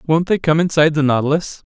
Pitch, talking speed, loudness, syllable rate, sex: 155 Hz, 210 wpm, -16 LUFS, 6.2 syllables/s, male